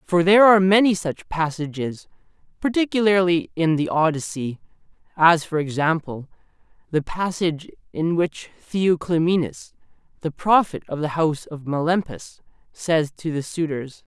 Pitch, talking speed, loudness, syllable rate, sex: 165 Hz, 125 wpm, -21 LUFS, 4.7 syllables/s, male